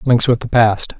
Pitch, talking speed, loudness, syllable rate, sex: 120 Hz, 240 wpm, -14 LUFS, 4.7 syllables/s, male